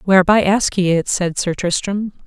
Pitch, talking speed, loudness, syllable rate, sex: 190 Hz, 185 wpm, -17 LUFS, 4.9 syllables/s, female